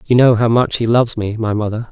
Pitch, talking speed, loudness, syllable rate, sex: 115 Hz, 280 wpm, -15 LUFS, 6.1 syllables/s, male